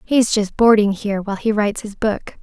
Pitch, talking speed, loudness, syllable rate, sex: 210 Hz, 220 wpm, -18 LUFS, 5.6 syllables/s, female